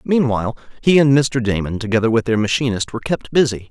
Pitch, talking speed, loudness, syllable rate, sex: 120 Hz, 195 wpm, -17 LUFS, 6.3 syllables/s, male